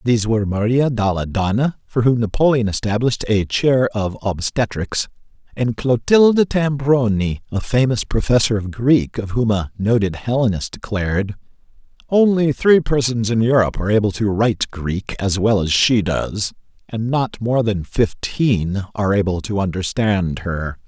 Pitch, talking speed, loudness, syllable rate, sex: 110 Hz, 150 wpm, -18 LUFS, 4.7 syllables/s, male